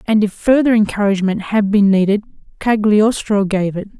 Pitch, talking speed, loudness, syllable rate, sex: 210 Hz, 150 wpm, -15 LUFS, 5.2 syllables/s, female